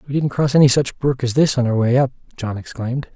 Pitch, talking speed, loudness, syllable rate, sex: 130 Hz, 265 wpm, -18 LUFS, 6.2 syllables/s, male